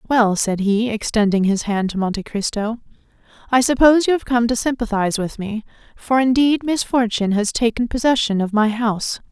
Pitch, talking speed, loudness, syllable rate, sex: 225 Hz, 175 wpm, -18 LUFS, 5.4 syllables/s, female